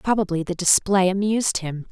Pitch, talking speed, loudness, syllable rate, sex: 190 Hz, 155 wpm, -20 LUFS, 5.6 syllables/s, female